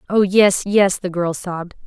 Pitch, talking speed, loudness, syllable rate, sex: 185 Hz, 195 wpm, -17 LUFS, 4.5 syllables/s, female